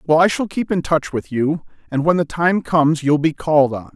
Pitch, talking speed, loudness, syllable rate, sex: 155 Hz, 260 wpm, -18 LUFS, 5.4 syllables/s, male